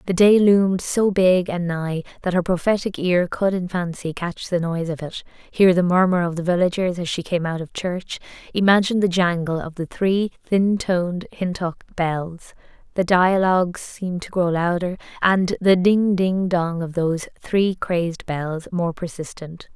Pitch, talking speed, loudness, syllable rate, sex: 180 Hz, 180 wpm, -21 LUFS, 4.6 syllables/s, female